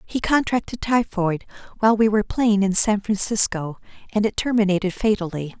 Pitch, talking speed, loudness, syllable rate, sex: 205 Hz, 150 wpm, -21 LUFS, 5.4 syllables/s, female